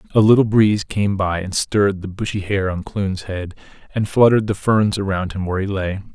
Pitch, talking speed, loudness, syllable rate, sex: 100 Hz, 215 wpm, -19 LUFS, 5.6 syllables/s, male